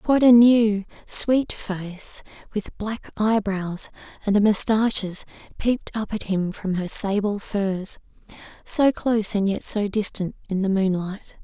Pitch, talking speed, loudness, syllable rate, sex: 205 Hz, 130 wpm, -22 LUFS, 3.9 syllables/s, female